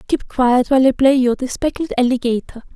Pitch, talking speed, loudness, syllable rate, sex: 255 Hz, 195 wpm, -16 LUFS, 5.6 syllables/s, female